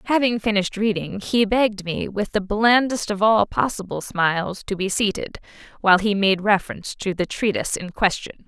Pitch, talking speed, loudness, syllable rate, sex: 205 Hz, 175 wpm, -21 LUFS, 5.4 syllables/s, female